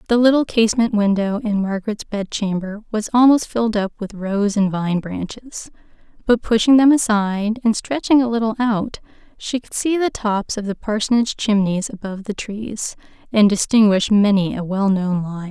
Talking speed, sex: 180 wpm, female